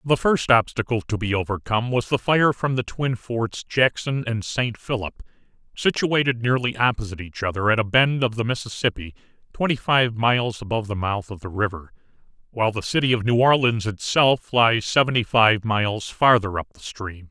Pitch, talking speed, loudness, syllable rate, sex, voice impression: 115 Hz, 180 wpm, -21 LUFS, 5.3 syllables/s, male, masculine, middle-aged, slightly muffled, slightly unique, slightly intense